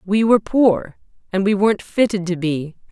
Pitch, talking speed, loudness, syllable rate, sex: 200 Hz, 185 wpm, -18 LUFS, 5.1 syllables/s, female